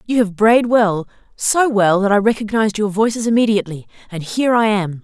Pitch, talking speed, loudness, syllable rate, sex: 210 Hz, 190 wpm, -16 LUFS, 5.7 syllables/s, female